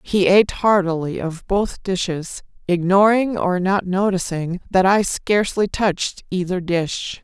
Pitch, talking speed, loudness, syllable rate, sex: 185 Hz, 135 wpm, -19 LUFS, 4.2 syllables/s, female